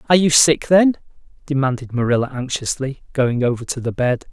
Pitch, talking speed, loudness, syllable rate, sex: 135 Hz, 165 wpm, -18 LUFS, 5.7 syllables/s, male